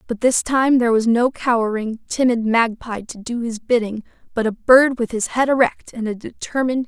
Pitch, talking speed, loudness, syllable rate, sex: 235 Hz, 210 wpm, -19 LUFS, 5.5 syllables/s, female